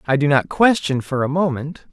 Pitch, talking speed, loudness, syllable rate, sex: 150 Hz, 220 wpm, -18 LUFS, 5.1 syllables/s, male